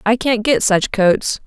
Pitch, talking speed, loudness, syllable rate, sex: 220 Hz, 205 wpm, -15 LUFS, 3.7 syllables/s, female